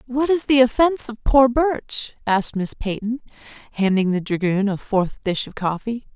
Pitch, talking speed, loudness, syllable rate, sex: 230 Hz, 175 wpm, -20 LUFS, 4.8 syllables/s, female